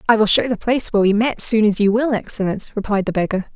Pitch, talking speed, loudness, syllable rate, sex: 215 Hz, 270 wpm, -18 LUFS, 6.9 syllables/s, female